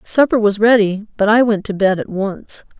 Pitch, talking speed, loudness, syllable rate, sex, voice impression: 210 Hz, 215 wpm, -15 LUFS, 4.9 syllables/s, female, very feminine, slightly young, slightly adult-like, very thin, slightly relaxed, slightly weak, slightly bright, slightly hard, clear, fluent, very cute, intellectual, refreshing, very sincere, very calm, very friendly, very reassuring, unique, very elegant, sweet, slightly lively, kind, slightly intense, slightly sharp, slightly modest, slightly light